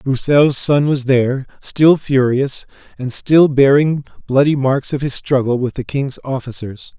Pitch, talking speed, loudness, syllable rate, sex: 135 Hz, 155 wpm, -15 LUFS, 4.2 syllables/s, male